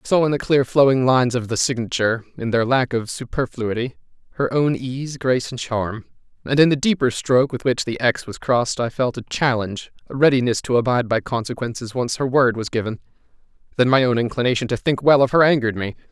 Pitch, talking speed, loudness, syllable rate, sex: 125 Hz, 215 wpm, -20 LUFS, 6.1 syllables/s, male